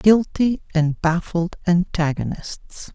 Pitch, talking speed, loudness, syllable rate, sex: 180 Hz, 80 wpm, -21 LUFS, 3.3 syllables/s, female